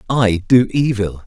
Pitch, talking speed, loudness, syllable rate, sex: 110 Hz, 140 wpm, -16 LUFS, 4.0 syllables/s, male